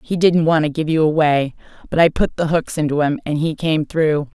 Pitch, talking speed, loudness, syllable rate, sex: 155 Hz, 245 wpm, -18 LUFS, 5.2 syllables/s, female